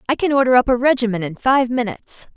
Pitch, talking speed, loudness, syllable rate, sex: 245 Hz, 230 wpm, -17 LUFS, 6.4 syllables/s, female